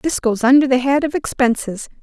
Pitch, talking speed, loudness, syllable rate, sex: 260 Hz, 205 wpm, -16 LUFS, 5.4 syllables/s, female